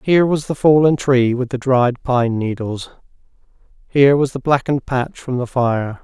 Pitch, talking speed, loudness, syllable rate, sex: 130 Hz, 180 wpm, -17 LUFS, 4.8 syllables/s, male